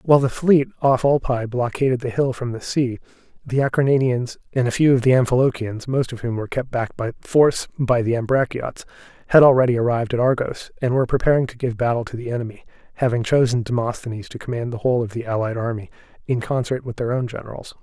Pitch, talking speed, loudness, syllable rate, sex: 125 Hz, 205 wpm, -20 LUFS, 6.4 syllables/s, male